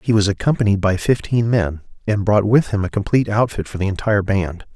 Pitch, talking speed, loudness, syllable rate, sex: 105 Hz, 215 wpm, -18 LUFS, 6.0 syllables/s, male